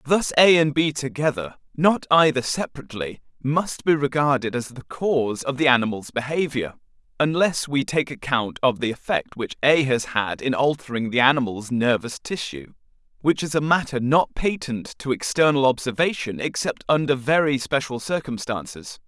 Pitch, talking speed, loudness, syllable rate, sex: 135 Hz, 155 wpm, -22 LUFS, 5.0 syllables/s, male